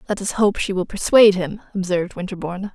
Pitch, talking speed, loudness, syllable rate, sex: 190 Hz, 195 wpm, -19 LUFS, 6.5 syllables/s, female